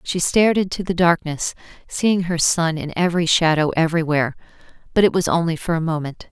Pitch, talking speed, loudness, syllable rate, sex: 170 Hz, 180 wpm, -19 LUFS, 5.9 syllables/s, female